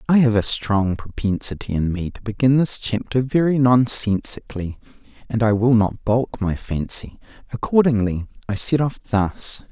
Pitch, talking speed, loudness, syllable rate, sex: 115 Hz, 150 wpm, -20 LUFS, 4.6 syllables/s, male